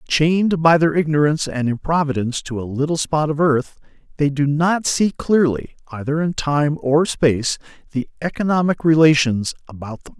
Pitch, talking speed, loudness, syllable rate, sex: 150 Hz, 160 wpm, -18 LUFS, 5.1 syllables/s, male